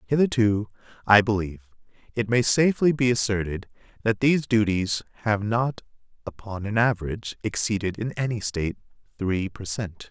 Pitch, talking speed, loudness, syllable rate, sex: 110 Hz, 135 wpm, -24 LUFS, 5.4 syllables/s, male